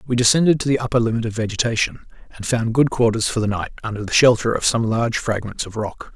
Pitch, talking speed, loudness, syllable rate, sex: 115 Hz, 235 wpm, -19 LUFS, 6.3 syllables/s, male